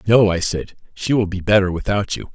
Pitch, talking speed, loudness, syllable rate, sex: 100 Hz, 230 wpm, -19 LUFS, 5.5 syllables/s, male